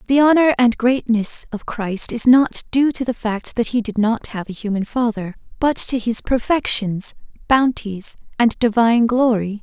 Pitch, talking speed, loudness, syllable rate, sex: 235 Hz, 175 wpm, -18 LUFS, 4.5 syllables/s, female